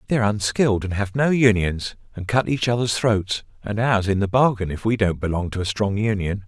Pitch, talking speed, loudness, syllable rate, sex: 105 Hz, 220 wpm, -21 LUFS, 5.4 syllables/s, male